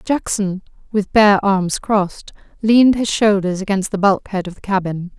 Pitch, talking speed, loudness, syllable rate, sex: 200 Hz, 160 wpm, -17 LUFS, 4.7 syllables/s, female